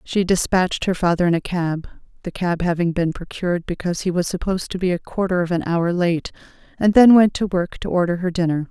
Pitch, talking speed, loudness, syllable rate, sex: 180 Hz, 230 wpm, -20 LUFS, 5.9 syllables/s, female